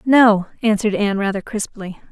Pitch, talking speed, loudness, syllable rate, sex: 210 Hz, 140 wpm, -18 LUFS, 5.6 syllables/s, female